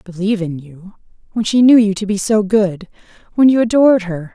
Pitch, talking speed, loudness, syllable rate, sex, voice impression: 205 Hz, 180 wpm, -14 LUFS, 5.6 syllables/s, female, feminine, middle-aged, tensed, slightly powerful, clear, fluent, intellectual, calm, elegant, sharp